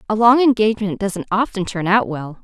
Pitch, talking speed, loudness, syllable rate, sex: 205 Hz, 195 wpm, -17 LUFS, 5.5 syllables/s, female